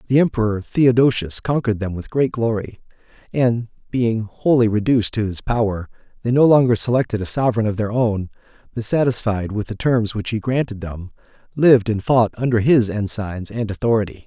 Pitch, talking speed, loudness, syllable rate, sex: 115 Hz, 170 wpm, -19 LUFS, 5.5 syllables/s, male